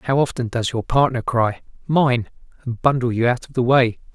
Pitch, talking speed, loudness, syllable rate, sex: 125 Hz, 200 wpm, -20 LUFS, 5.0 syllables/s, male